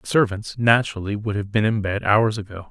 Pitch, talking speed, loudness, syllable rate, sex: 105 Hz, 220 wpm, -21 LUFS, 5.7 syllables/s, male